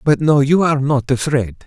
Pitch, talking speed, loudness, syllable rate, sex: 140 Hz, 215 wpm, -15 LUFS, 5.4 syllables/s, male